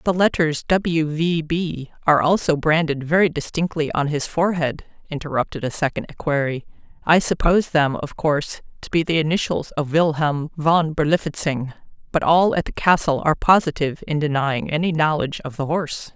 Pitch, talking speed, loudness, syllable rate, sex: 155 Hz, 160 wpm, -20 LUFS, 5.3 syllables/s, female